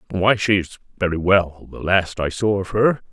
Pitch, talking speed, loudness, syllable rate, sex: 95 Hz, 190 wpm, -19 LUFS, 4.3 syllables/s, male